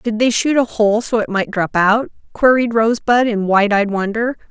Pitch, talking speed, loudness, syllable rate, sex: 220 Hz, 215 wpm, -16 LUFS, 4.9 syllables/s, female